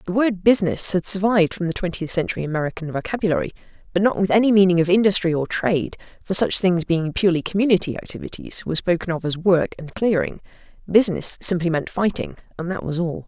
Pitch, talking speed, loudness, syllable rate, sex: 180 Hz, 190 wpm, -20 LUFS, 6.6 syllables/s, female